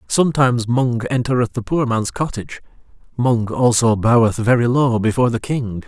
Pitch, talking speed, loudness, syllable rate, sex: 120 Hz, 155 wpm, -17 LUFS, 5.3 syllables/s, male